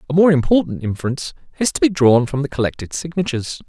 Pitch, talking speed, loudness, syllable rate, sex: 145 Hz, 195 wpm, -18 LUFS, 6.9 syllables/s, male